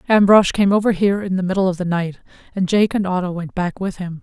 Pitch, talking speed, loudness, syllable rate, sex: 190 Hz, 255 wpm, -18 LUFS, 6.3 syllables/s, female